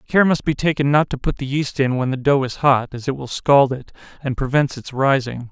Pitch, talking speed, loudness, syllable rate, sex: 135 Hz, 260 wpm, -19 LUFS, 5.3 syllables/s, male